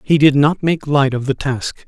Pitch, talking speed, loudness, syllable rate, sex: 140 Hz, 255 wpm, -16 LUFS, 4.7 syllables/s, male